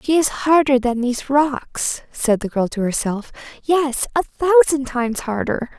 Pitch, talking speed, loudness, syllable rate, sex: 260 Hz, 165 wpm, -19 LUFS, 4.8 syllables/s, female